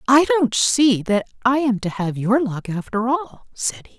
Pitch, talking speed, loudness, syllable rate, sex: 230 Hz, 210 wpm, -20 LUFS, 4.1 syllables/s, female